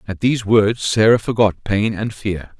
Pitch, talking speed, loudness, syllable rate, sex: 105 Hz, 185 wpm, -17 LUFS, 4.5 syllables/s, male